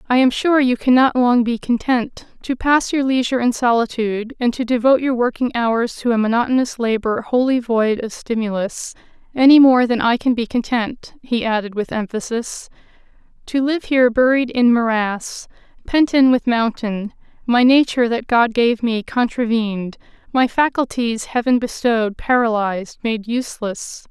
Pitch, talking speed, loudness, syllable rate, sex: 240 Hz, 150 wpm, -17 LUFS, 4.9 syllables/s, female